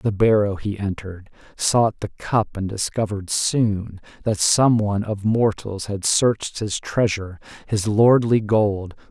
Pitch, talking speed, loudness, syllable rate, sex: 105 Hz, 145 wpm, -20 LUFS, 4.2 syllables/s, male